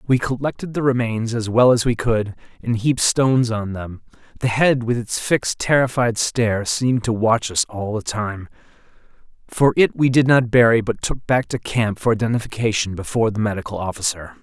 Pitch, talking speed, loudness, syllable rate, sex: 115 Hz, 185 wpm, -19 LUFS, 5.4 syllables/s, male